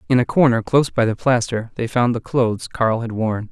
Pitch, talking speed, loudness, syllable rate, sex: 120 Hz, 240 wpm, -19 LUFS, 5.5 syllables/s, male